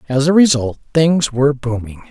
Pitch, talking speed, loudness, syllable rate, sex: 135 Hz, 170 wpm, -15 LUFS, 5.1 syllables/s, male